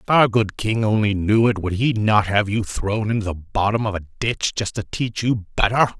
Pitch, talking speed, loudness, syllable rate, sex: 105 Hz, 240 wpm, -20 LUFS, 4.8 syllables/s, male